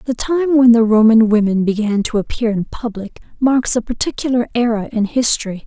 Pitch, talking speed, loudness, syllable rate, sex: 230 Hz, 180 wpm, -15 LUFS, 5.3 syllables/s, female